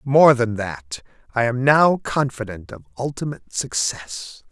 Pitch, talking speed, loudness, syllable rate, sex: 120 Hz, 135 wpm, -20 LUFS, 4.2 syllables/s, male